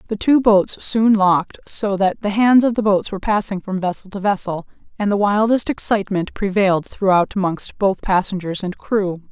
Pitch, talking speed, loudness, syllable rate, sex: 200 Hz, 185 wpm, -18 LUFS, 5.1 syllables/s, female